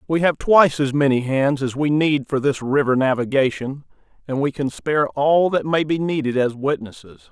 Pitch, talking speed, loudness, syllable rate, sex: 140 Hz, 195 wpm, -19 LUFS, 5.1 syllables/s, male